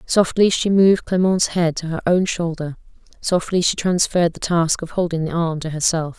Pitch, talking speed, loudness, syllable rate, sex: 170 Hz, 195 wpm, -19 LUFS, 5.2 syllables/s, female